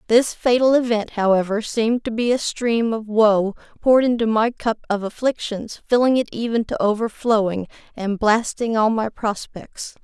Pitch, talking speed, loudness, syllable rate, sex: 225 Hz, 160 wpm, -20 LUFS, 4.7 syllables/s, female